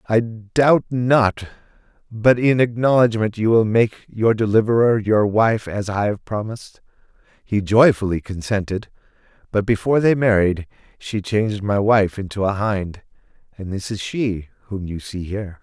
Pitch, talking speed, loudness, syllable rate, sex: 105 Hz, 150 wpm, -19 LUFS, 4.5 syllables/s, male